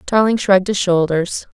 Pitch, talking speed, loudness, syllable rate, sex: 190 Hz, 155 wpm, -16 LUFS, 5.0 syllables/s, female